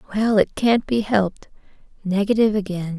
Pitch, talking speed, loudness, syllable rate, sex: 205 Hz, 140 wpm, -20 LUFS, 5.6 syllables/s, female